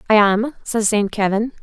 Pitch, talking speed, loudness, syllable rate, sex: 215 Hz, 185 wpm, -18 LUFS, 4.6 syllables/s, female